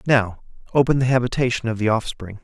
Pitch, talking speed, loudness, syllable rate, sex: 120 Hz, 170 wpm, -20 LUFS, 6.0 syllables/s, male